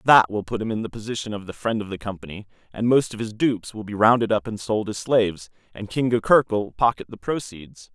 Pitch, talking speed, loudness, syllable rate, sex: 105 Hz, 240 wpm, -23 LUFS, 5.8 syllables/s, male